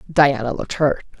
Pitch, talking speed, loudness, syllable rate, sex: 140 Hz, 150 wpm, -19 LUFS, 5.6 syllables/s, female